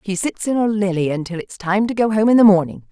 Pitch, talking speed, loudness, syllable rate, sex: 200 Hz, 310 wpm, -17 LUFS, 6.3 syllables/s, female